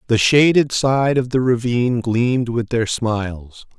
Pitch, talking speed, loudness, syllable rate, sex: 120 Hz, 160 wpm, -17 LUFS, 4.3 syllables/s, male